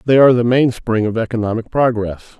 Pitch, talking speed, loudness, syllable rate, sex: 115 Hz, 175 wpm, -16 LUFS, 6.1 syllables/s, male